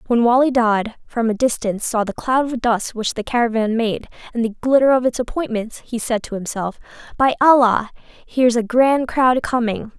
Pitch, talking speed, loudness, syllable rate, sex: 235 Hz, 190 wpm, -18 LUFS, 5.2 syllables/s, female